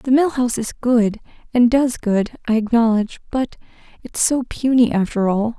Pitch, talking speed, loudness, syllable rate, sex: 235 Hz, 170 wpm, -18 LUFS, 4.9 syllables/s, female